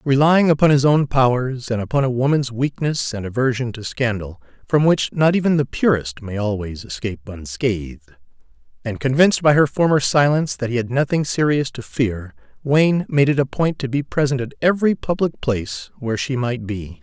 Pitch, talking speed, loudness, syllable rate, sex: 130 Hz, 185 wpm, -19 LUFS, 5.3 syllables/s, male